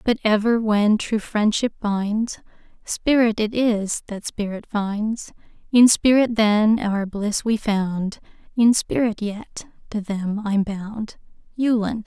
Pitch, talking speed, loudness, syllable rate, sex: 215 Hz, 135 wpm, -21 LUFS, 3.5 syllables/s, female